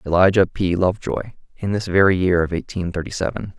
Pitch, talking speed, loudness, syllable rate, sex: 95 Hz, 185 wpm, -20 LUFS, 5.8 syllables/s, male